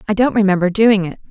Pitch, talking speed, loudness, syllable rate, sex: 205 Hz, 230 wpm, -15 LUFS, 6.6 syllables/s, female